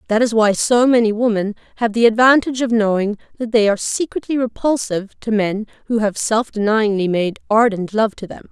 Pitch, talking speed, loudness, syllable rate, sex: 220 Hz, 190 wpm, -17 LUFS, 5.6 syllables/s, female